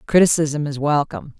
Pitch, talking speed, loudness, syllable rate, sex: 150 Hz, 130 wpm, -19 LUFS, 5.7 syllables/s, female